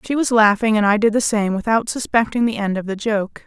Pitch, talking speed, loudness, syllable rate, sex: 215 Hz, 260 wpm, -18 LUFS, 5.6 syllables/s, female